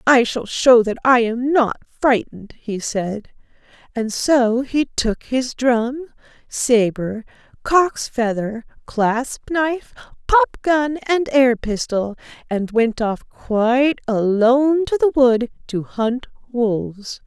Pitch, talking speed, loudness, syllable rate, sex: 245 Hz, 130 wpm, -18 LUFS, 3.4 syllables/s, female